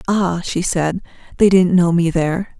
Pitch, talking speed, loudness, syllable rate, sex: 175 Hz, 185 wpm, -16 LUFS, 4.6 syllables/s, female